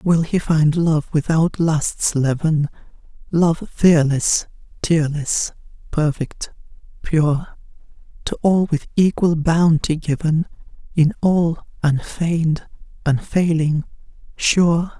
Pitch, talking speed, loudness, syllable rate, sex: 160 Hz, 90 wpm, -19 LUFS, 3.3 syllables/s, female